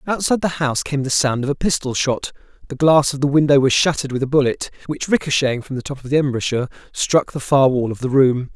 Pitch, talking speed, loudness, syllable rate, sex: 135 Hz, 245 wpm, -18 LUFS, 6.5 syllables/s, male